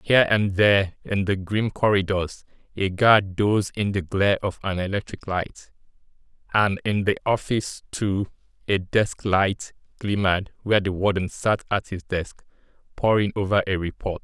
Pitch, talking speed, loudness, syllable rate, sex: 100 Hz, 155 wpm, -23 LUFS, 4.8 syllables/s, male